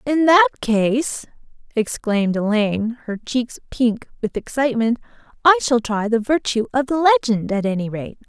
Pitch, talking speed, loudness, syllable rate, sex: 230 Hz, 150 wpm, -19 LUFS, 4.9 syllables/s, female